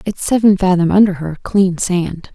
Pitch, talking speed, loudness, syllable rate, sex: 185 Hz, 155 wpm, -15 LUFS, 4.6 syllables/s, female